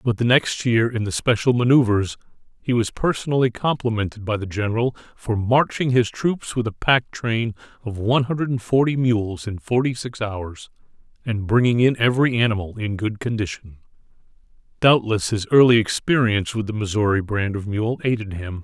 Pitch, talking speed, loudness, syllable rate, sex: 115 Hz, 165 wpm, -21 LUFS, 5.2 syllables/s, male